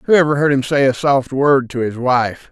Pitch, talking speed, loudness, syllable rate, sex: 135 Hz, 265 wpm, -15 LUFS, 5.1 syllables/s, male